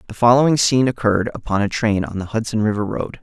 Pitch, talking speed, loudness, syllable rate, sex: 110 Hz, 225 wpm, -18 LUFS, 6.7 syllables/s, male